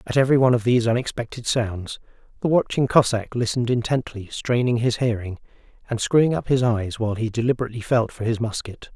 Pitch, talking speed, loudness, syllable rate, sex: 115 Hz, 180 wpm, -22 LUFS, 6.4 syllables/s, male